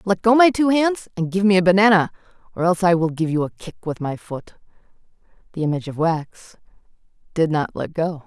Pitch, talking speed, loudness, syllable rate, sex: 180 Hz, 210 wpm, -19 LUFS, 5.8 syllables/s, female